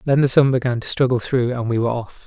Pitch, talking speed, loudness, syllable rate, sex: 125 Hz, 290 wpm, -19 LUFS, 6.6 syllables/s, male